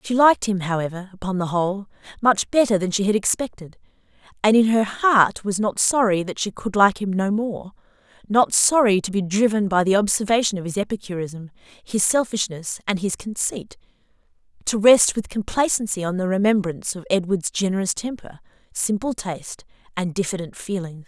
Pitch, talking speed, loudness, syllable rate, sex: 200 Hz, 165 wpm, -21 LUFS, 5.3 syllables/s, female